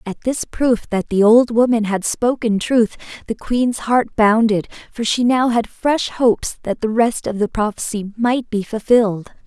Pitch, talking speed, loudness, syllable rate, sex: 225 Hz, 185 wpm, -17 LUFS, 4.4 syllables/s, female